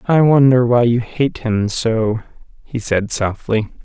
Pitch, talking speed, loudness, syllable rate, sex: 120 Hz, 155 wpm, -16 LUFS, 3.7 syllables/s, male